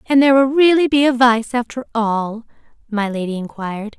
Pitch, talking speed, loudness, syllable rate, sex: 240 Hz, 180 wpm, -16 LUFS, 5.4 syllables/s, female